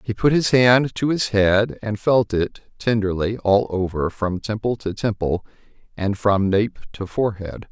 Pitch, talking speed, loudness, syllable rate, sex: 105 Hz, 170 wpm, -20 LUFS, 4.3 syllables/s, male